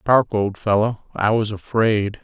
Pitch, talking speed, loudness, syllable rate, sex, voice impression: 110 Hz, 160 wpm, -20 LUFS, 3.9 syllables/s, male, very masculine, middle-aged, slightly thick, muffled, cool, slightly wild